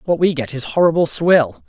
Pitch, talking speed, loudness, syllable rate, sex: 155 Hz, 215 wpm, -16 LUFS, 5.2 syllables/s, male